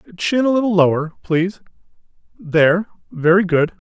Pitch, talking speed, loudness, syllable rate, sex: 175 Hz, 110 wpm, -17 LUFS, 5.6 syllables/s, male